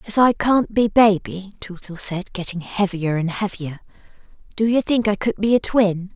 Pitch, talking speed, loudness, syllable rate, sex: 200 Hz, 185 wpm, -19 LUFS, 4.7 syllables/s, female